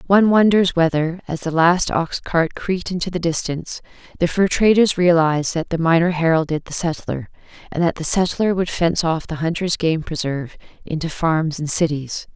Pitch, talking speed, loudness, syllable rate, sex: 170 Hz, 180 wpm, -19 LUFS, 5.3 syllables/s, female